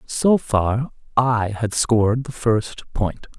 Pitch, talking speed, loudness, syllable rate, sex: 115 Hz, 140 wpm, -20 LUFS, 3.3 syllables/s, male